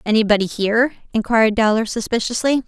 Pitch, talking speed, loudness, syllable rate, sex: 225 Hz, 110 wpm, -18 LUFS, 6.3 syllables/s, female